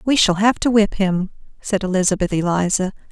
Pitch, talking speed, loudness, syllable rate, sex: 195 Hz, 175 wpm, -18 LUFS, 5.4 syllables/s, female